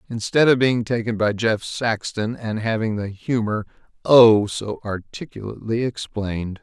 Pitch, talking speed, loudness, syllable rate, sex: 110 Hz, 135 wpm, -21 LUFS, 4.5 syllables/s, male